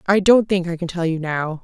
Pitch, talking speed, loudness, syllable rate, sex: 175 Hz, 295 wpm, -19 LUFS, 5.4 syllables/s, female